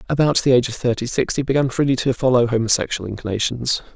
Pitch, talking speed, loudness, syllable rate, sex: 125 Hz, 195 wpm, -19 LUFS, 6.8 syllables/s, male